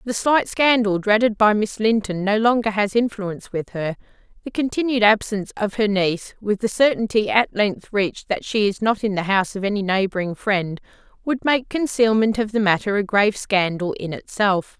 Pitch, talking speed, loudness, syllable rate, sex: 210 Hz, 190 wpm, -20 LUFS, 5.2 syllables/s, female